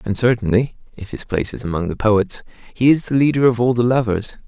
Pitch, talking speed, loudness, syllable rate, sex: 115 Hz, 230 wpm, -18 LUFS, 5.9 syllables/s, male